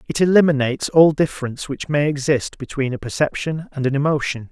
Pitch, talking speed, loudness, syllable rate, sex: 145 Hz, 175 wpm, -19 LUFS, 6.1 syllables/s, male